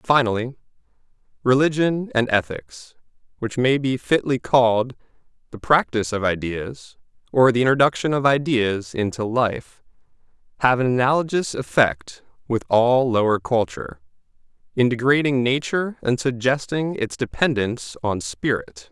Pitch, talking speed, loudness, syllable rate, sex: 120 Hz, 110 wpm, -21 LUFS, 4.8 syllables/s, male